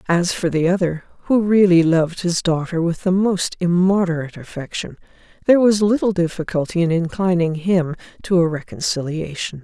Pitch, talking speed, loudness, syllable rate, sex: 175 Hz, 150 wpm, -18 LUFS, 5.4 syllables/s, female